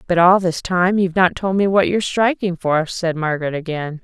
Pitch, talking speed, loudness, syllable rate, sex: 180 Hz, 225 wpm, -18 LUFS, 5.4 syllables/s, female